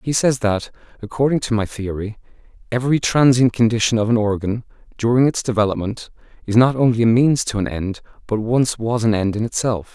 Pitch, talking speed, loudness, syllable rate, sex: 115 Hz, 185 wpm, -18 LUFS, 5.6 syllables/s, male